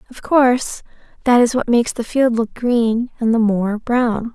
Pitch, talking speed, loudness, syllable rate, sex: 235 Hz, 195 wpm, -17 LUFS, 4.4 syllables/s, female